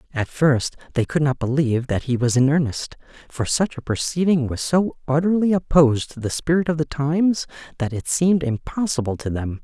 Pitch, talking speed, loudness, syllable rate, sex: 145 Hz, 195 wpm, -21 LUFS, 5.5 syllables/s, male